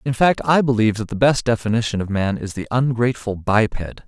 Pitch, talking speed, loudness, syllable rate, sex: 115 Hz, 205 wpm, -19 LUFS, 6.1 syllables/s, male